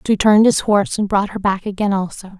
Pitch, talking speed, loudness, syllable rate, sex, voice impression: 200 Hz, 275 wpm, -16 LUFS, 6.8 syllables/s, female, very feminine, slightly adult-like, slightly soft, slightly cute, calm, slightly sweet, slightly kind